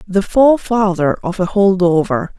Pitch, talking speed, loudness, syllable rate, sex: 190 Hz, 150 wpm, -14 LUFS, 4.5 syllables/s, female